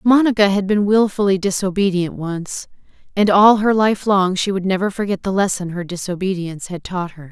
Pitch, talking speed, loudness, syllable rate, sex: 190 Hz, 180 wpm, -17 LUFS, 5.3 syllables/s, female